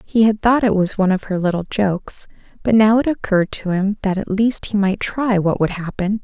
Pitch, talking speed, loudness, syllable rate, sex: 200 Hz, 240 wpm, -18 LUFS, 5.4 syllables/s, female